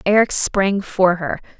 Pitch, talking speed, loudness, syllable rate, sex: 190 Hz, 150 wpm, -17 LUFS, 3.9 syllables/s, female